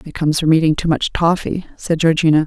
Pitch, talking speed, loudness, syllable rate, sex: 160 Hz, 220 wpm, -16 LUFS, 6.2 syllables/s, female